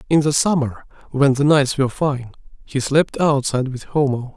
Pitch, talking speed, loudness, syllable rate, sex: 140 Hz, 180 wpm, -19 LUFS, 5.1 syllables/s, male